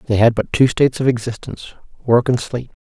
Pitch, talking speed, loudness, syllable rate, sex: 120 Hz, 190 wpm, -17 LUFS, 6.4 syllables/s, male